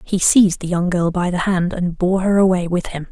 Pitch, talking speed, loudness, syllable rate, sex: 180 Hz, 270 wpm, -17 LUFS, 5.3 syllables/s, female